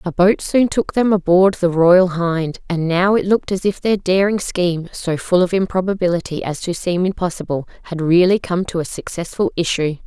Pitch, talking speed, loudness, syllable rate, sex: 180 Hz, 195 wpm, -17 LUFS, 5.1 syllables/s, female